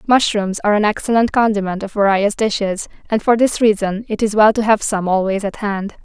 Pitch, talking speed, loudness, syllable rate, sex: 210 Hz, 210 wpm, -16 LUFS, 5.5 syllables/s, female